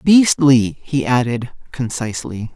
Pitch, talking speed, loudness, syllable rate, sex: 130 Hz, 95 wpm, -17 LUFS, 4.1 syllables/s, male